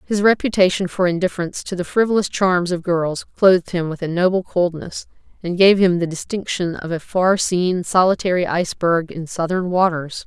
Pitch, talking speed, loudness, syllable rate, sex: 180 Hz, 175 wpm, -18 LUFS, 5.3 syllables/s, female